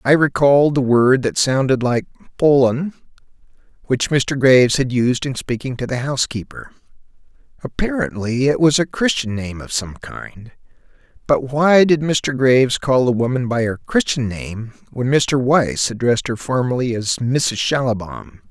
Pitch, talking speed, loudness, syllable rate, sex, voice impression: 130 Hz, 155 wpm, -17 LUFS, 4.5 syllables/s, male, masculine, slightly old, slightly thick, tensed, slightly powerful, slightly bright, slightly soft, slightly clear, slightly halting, slightly raspy, slightly cool, intellectual, slightly refreshing, very sincere, slightly calm, slightly friendly, slightly reassuring, slightly unique, slightly elegant, wild, slightly lively, slightly kind, slightly intense